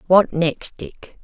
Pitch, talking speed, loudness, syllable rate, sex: 160 Hz, 145 wpm, -19 LUFS, 3.0 syllables/s, female